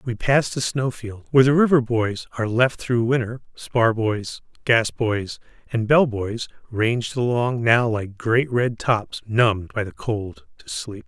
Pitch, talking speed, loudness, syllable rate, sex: 115 Hz, 180 wpm, -21 LUFS, 4.2 syllables/s, male